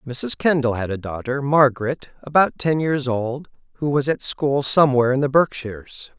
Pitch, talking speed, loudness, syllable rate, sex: 135 Hz, 175 wpm, -20 LUFS, 5.1 syllables/s, male